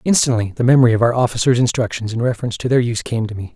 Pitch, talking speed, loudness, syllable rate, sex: 120 Hz, 255 wpm, -17 LUFS, 7.9 syllables/s, male